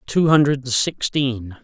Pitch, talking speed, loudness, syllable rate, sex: 135 Hz, 110 wpm, -19 LUFS, 3.3 syllables/s, male